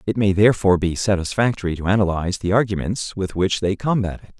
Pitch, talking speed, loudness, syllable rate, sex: 100 Hz, 190 wpm, -20 LUFS, 6.5 syllables/s, male